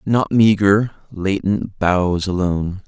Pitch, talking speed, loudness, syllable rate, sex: 95 Hz, 105 wpm, -18 LUFS, 3.5 syllables/s, male